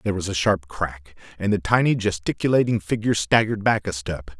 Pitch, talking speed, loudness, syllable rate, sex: 100 Hz, 190 wpm, -22 LUFS, 6.0 syllables/s, male